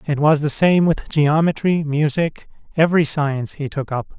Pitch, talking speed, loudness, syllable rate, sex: 150 Hz, 170 wpm, -18 LUFS, 4.8 syllables/s, male